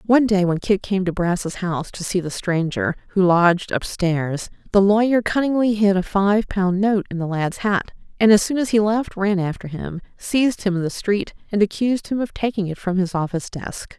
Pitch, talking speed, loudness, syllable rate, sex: 195 Hz, 225 wpm, -20 LUFS, 5.2 syllables/s, female